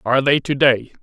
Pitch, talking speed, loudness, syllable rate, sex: 130 Hz, 235 wpm, -16 LUFS, 6.0 syllables/s, male